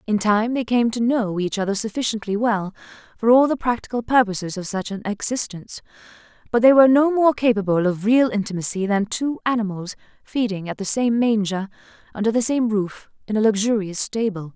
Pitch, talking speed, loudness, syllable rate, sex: 220 Hz, 180 wpm, -20 LUFS, 5.6 syllables/s, female